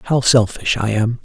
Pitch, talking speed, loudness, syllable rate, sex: 115 Hz, 195 wpm, -16 LUFS, 4.9 syllables/s, male